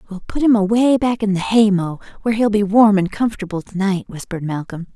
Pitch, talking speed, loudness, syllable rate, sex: 205 Hz, 230 wpm, -17 LUFS, 6.1 syllables/s, female